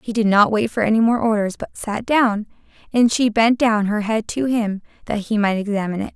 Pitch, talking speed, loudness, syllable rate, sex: 220 Hz, 235 wpm, -19 LUFS, 5.5 syllables/s, female